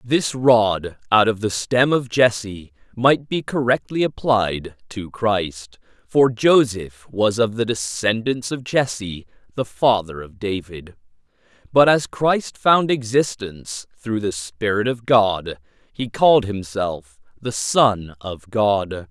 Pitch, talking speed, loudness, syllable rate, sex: 110 Hz, 135 wpm, -19 LUFS, 3.6 syllables/s, male